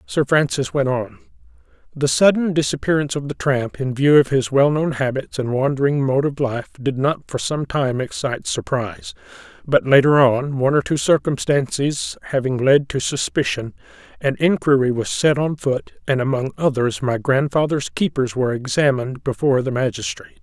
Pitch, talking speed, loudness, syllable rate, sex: 135 Hz, 165 wpm, -19 LUFS, 5.2 syllables/s, male